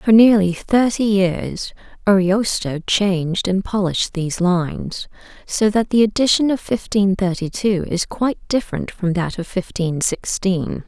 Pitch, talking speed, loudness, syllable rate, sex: 195 Hz, 145 wpm, -18 LUFS, 4.4 syllables/s, female